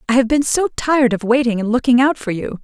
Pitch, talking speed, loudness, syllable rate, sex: 250 Hz, 275 wpm, -16 LUFS, 6.3 syllables/s, female